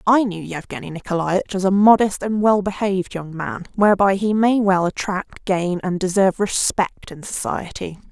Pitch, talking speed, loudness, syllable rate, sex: 190 Hz, 170 wpm, -19 LUFS, 4.9 syllables/s, female